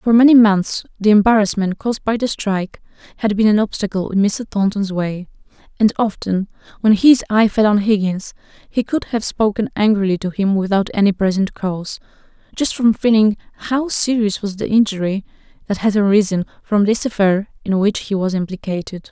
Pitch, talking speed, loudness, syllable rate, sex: 205 Hz, 175 wpm, -17 LUFS, 5.4 syllables/s, female